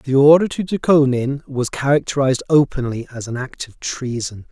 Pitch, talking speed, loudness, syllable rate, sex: 135 Hz, 160 wpm, -18 LUFS, 5.1 syllables/s, male